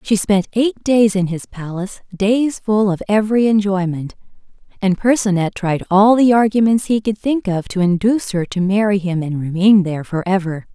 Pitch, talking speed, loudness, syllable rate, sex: 200 Hz, 180 wpm, -16 LUFS, 5.1 syllables/s, female